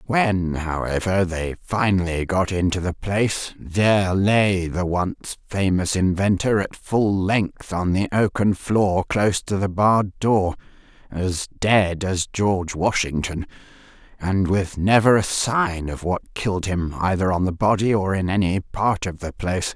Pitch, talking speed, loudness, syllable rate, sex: 95 Hz, 155 wpm, -21 LUFS, 4.1 syllables/s, female